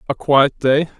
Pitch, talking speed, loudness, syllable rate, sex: 140 Hz, 180 wpm, -16 LUFS, 4.2 syllables/s, male